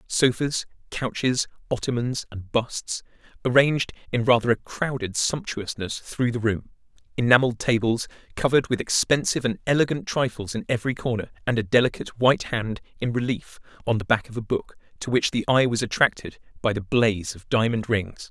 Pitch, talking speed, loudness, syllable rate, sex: 120 Hz, 165 wpm, -24 LUFS, 5.5 syllables/s, male